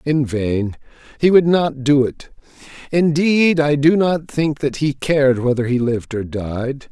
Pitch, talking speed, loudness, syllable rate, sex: 140 Hz, 175 wpm, -17 LUFS, 4.1 syllables/s, male